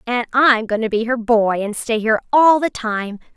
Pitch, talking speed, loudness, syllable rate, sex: 230 Hz, 230 wpm, -17 LUFS, 4.8 syllables/s, female